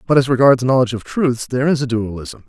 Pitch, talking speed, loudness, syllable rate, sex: 125 Hz, 240 wpm, -16 LUFS, 7.1 syllables/s, male